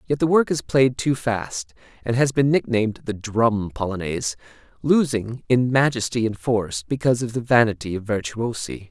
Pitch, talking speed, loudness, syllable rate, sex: 115 Hz, 170 wpm, -22 LUFS, 5.0 syllables/s, male